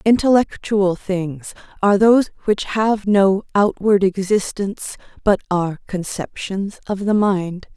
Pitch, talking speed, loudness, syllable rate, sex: 200 Hz, 115 wpm, -18 LUFS, 4.1 syllables/s, female